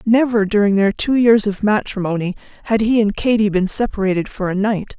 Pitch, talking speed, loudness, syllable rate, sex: 210 Hz, 195 wpm, -17 LUFS, 5.6 syllables/s, female